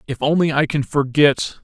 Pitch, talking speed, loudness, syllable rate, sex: 145 Hz, 185 wpm, -17 LUFS, 4.9 syllables/s, male